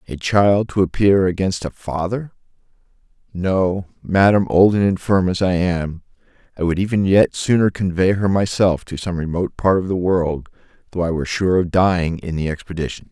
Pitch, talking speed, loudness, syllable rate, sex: 90 Hz, 175 wpm, -18 LUFS, 5.1 syllables/s, male